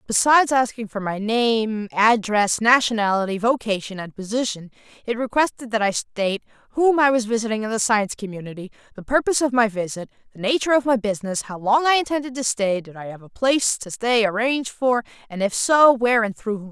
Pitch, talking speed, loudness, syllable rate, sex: 225 Hz, 195 wpm, -20 LUFS, 5.9 syllables/s, female